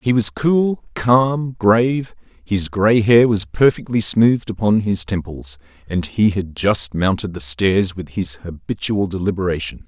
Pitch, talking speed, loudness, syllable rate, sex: 100 Hz, 150 wpm, -17 LUFS, 4.1 syllables/s, male